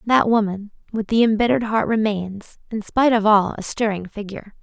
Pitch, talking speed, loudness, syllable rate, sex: 215 Hz, 180 wpm, -20 LUFS, 5.6 syllables/s, female